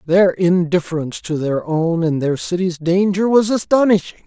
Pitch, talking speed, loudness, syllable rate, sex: 175 Hz, 155 wpm, -17 LUFS, 4.9 syllables/s, male